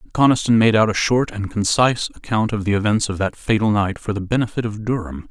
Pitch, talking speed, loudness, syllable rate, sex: 105 Hz, 225 wpm, -19 LUFS, 6.1 syllables/s, male